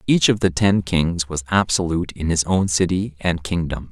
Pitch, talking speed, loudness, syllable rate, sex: 85 Hz, 200 wpm, -20 LUFS, 4.9 syllables/s, male